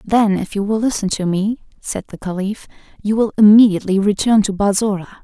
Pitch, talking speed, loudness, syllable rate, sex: 205 Hz, 185 wpm, -16 LUFS, 5.6 syllables/s, female